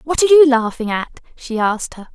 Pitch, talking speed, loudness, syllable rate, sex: 255 Hz, 225 wpm, -15 LUFS, 5.8 syllables/s, female